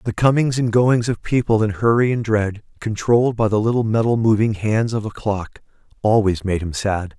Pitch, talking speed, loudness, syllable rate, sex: 110 Hz, 200 wpm, -19 LUFS, 5.1 syllables/s, male